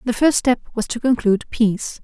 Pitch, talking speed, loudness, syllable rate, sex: 235 Hz, 205 wpm, -19 LUFS, 6.0 syllables/s, female